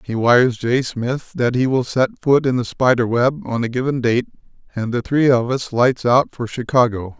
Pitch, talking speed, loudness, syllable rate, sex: 125 Hz, 215 wpm, -18 LUFS, 4.7 syllables/s, male